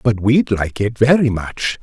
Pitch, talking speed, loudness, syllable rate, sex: 115 Hz, 200 wpm, -16 LUFS, 4.1 syllables/s, male